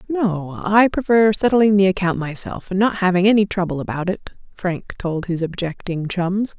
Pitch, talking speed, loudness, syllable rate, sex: 190 Hz, 175 wpm, -19 LUFS, 4.7 syllables/s, female